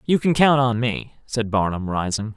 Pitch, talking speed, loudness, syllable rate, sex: 115 Hz, 205 wpm, -21 LUFS, 4.7 syllables/s, male